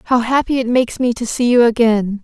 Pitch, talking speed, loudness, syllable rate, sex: 240 Hz, 240 wpm, -15 LUFS, 5.9 syllables/s, female